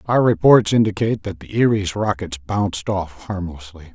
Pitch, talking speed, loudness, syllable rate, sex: 95 Hz, 150 wpm, -19 LUFS, 5.1 syllables/s, male